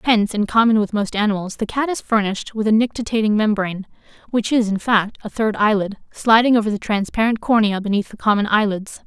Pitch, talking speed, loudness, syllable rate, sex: 215 Hz, 200 wpm, -19 LUFS, 6.1 syllables/s, female